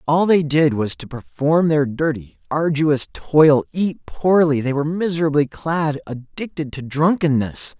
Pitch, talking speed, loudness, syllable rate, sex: 150 Hz, 145 wpm, -19 LUFS, 4.2 syllables/s, male